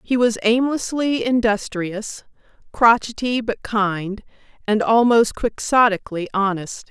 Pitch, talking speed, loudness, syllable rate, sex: 220 Hz, 95 wpm, -19 LUFS, 4.0 syllables/s, female